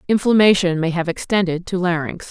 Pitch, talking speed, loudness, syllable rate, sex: 180 Hz, 155 wpm, -18 LUFS, 5.5 syllables/s, female